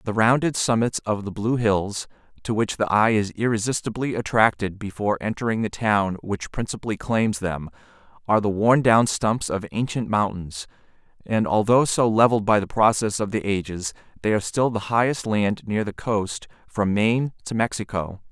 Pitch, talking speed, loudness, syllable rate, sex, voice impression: 105 Hz, 175 wpm, -22 LUFS, 5.1 syllables/s, male, very masculine, very adult-like, slightly middle-aged, thick, tensed, powerful, bright, slightly soft, clear, fluent, cool, very intellectual, refreshing, very sincere, very calm, slightly mature, friendly, reassuring, slightly unique, elegant, slightly wild, slightly sweet, slightly lively, kind, slightly modest